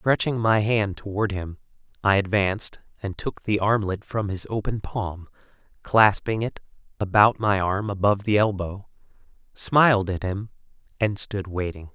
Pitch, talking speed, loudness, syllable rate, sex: 100 Hz, 145 wpm, -23 LUFS, 4.6 syllables/s, male